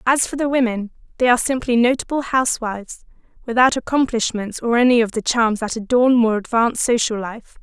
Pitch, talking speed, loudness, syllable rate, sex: 235 Hz, 175 wpm, -18 LUFS, 5.9 syllables/s, female